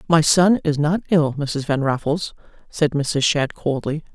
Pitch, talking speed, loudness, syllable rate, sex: 150 Hz, 175 wpm, -19 LUFS, 4.1 syllables/s, female